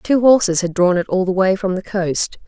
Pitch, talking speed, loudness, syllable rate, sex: 190 Hz, 265 wpm, -16 LUFS, 5.0 syllables/s, female